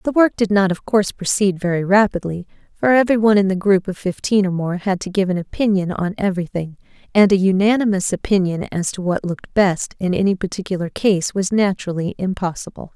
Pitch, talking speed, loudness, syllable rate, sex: 190 Hz, 195 wpm, -18 LUFS, 6.0 syllables/s, female